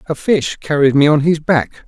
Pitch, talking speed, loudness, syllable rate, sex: 145 Hz, 225 wpm, -14 LUFS, 5.0 syllables/s, male